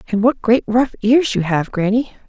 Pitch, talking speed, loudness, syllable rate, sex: 225 Hz, 210 wpm, -17 LUFS, 4.9 syllables/s, female